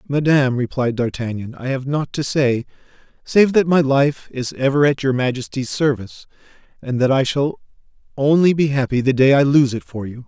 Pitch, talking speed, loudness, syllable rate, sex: 135 Hz, 185 wpm, -18 LUFS, 5.2 syllables/s, male